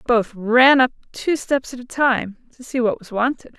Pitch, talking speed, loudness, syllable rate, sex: 245 Hz, 220 wpm, -19 LUFS, 4.5 syllables/s, female